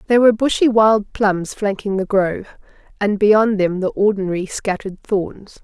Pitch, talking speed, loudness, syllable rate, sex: 205 Hz, 160 wpm, -17 LUFS, 5.0 syllables/s, female